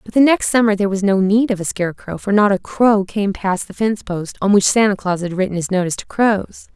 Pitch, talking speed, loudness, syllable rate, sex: 200 Hz, 265 wpm, -17 LUFS, 6.0 syllables/s, female